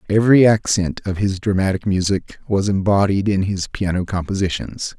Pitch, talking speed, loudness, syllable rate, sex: 100 Hz, 145 wpm, -18 LUFS, 5.2 syllables/s, male